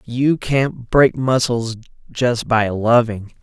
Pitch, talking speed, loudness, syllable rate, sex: 120 Hz, 125 wpm, -17 LUFS, 3.0 syllables/s, male